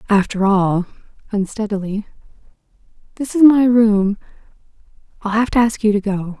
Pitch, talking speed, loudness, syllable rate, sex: 210 Hz, 115 wpm, -17 LUFS, 5.0 syllables/s, female